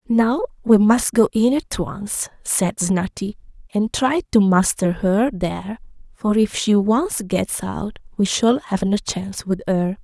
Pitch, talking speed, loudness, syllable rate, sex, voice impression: 215 Hz, 165 wpm, -20 LUFS, 3.8 syllables/s, female, feminine, slightly adult-like, slightly cute, refreshing, slightly sincere, friendly